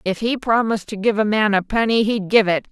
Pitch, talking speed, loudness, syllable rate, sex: 210 Hz, 265 wpm, -18 LUFS, 5.8 syllables/s, female